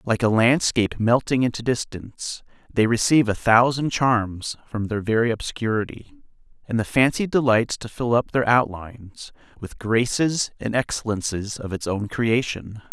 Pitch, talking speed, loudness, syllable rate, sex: 115 Hz, 150 wpm, -22 LUFS, 4.7 syllables/s, male